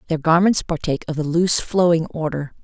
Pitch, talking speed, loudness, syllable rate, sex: 165 Hz, 180 wpm, -19 LUFS, 6.0 syllables/s, female